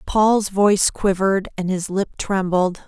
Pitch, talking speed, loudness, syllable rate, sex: 195 Hz, 145 wpm, -19 LUFS, 4.3 syllables/s, female